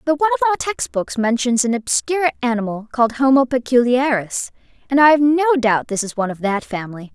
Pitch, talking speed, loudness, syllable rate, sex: 255 Hz, 200 wpm, -18 LUFS, 7.4 syllables/s, female